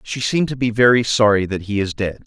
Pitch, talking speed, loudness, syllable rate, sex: 110 Hz, 265 wpm, -17 LUFS, 5.6 syllables/s, male